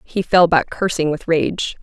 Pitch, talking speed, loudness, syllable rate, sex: 170 Hz, 195 wpm, -17 LUFS, 4.2 syllables/s, female